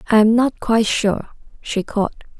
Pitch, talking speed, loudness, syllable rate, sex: 220 Hz, 175 wpm, -18 LUFS, 5.7 syllables/s, female